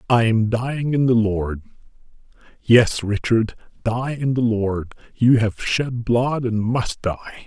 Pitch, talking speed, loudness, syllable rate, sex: 115 Hz, 155 wpm, -20 LUFS, 3.8 syllables/s, male